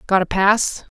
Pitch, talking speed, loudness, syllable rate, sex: 195 Hz, 190 wpm, -18 LUFS, 4.1 syllables/s, female